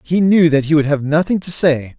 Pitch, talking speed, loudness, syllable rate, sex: 155 Hz, 270 wpm, -15 LUFS, 5.3 syllables/s, male